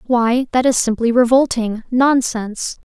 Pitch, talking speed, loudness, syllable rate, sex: 240 Hz, 125 wpm, -16 LUFS, 4.4 syllables/s, female